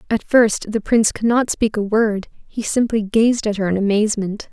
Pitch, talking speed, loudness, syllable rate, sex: 215 Hz, 210 wpm, -18 LUFS, 5.0 syllables/s, female